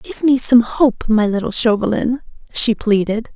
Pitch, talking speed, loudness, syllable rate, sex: 230 Hz, 160 wpm, -16 LUFS, 4.3 syllables/s, female